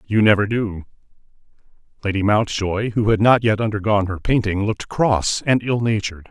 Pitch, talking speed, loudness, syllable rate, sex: 105 Hz, 160 wpm, -19 LUFS, 5.4 syllables/s, male